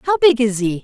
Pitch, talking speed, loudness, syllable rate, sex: 250 Hz, 285 wpm, -15 LUFS, 5.1 syllables/s, female